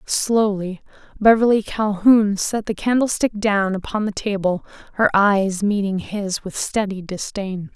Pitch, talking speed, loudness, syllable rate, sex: 205 Hz, 130 wpm, -19 LUFS, 4.1 syllables/s, female